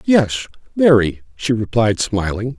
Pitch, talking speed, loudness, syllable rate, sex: 120 Hz, 95 wpm, -17 LUFS, 3.8 syllables/s, male